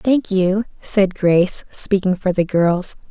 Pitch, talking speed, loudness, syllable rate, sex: 190 Hz, 155 wpm, -17 LUFS, 3.6 syllables/s, female